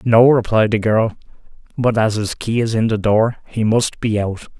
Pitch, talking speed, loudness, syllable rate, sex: 110 Hz, 210 wpm, -17 LUFS, 4.6 syllables/s, male